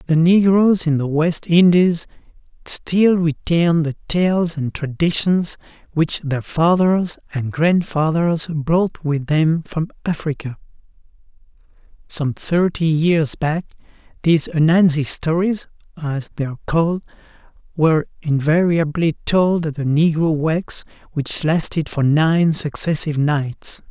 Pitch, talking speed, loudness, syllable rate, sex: 160 Hz, 115 wpm, -18 LUFS, 3.9 syllables/s, male